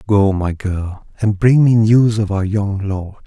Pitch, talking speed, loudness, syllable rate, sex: 105 Hz, 200 wpm, -16 LUFS, 3.8 syllables/s, male